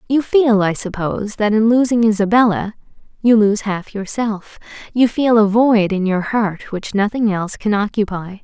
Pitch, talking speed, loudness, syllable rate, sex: 210 Hz, 170 wpm, -16 LUFS, 4.7 syllables/s, female